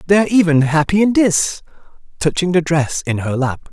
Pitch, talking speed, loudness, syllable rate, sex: 165 Hz, 175 wpm, -16 LUFS, 5.0 syllables/s, male